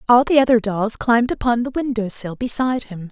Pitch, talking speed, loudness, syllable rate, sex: 230 Hz, 210 wpm, -19 LUFS, 5.8 syllables/s, female